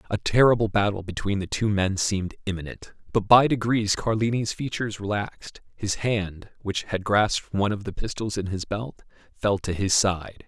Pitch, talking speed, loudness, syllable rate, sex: 105 Hz, 180 wpm, -24 LUFS, 5.0 syllables/s, male